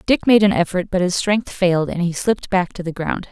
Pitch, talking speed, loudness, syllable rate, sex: 185 Hz, 270 wpm, -18 LUFS, 5.7 syllables/s, female